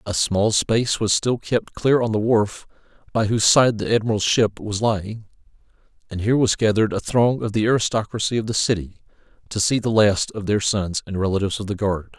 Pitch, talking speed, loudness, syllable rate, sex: 105 Hz, 205 wpm, -20 LUFS, 5.7 syllables/s, male